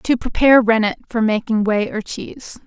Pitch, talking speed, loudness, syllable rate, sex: 225 Hz, 180 wpm, -17 LUFS, 5.3 syllables/s, female